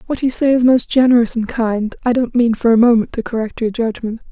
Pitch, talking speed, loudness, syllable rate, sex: 235 Hz, 250 wpm, -15 LUFS, 5.8 syllables/s, female